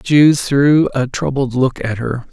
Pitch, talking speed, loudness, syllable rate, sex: 130 Hz, 180 wpm, -15 LUFS, 3.7 syllables/s, male